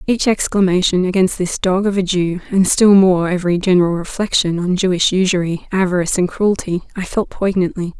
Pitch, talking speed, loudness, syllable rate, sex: 185 Hz, 175 wpm, -16 LUFS, 5.6 syllables/s, female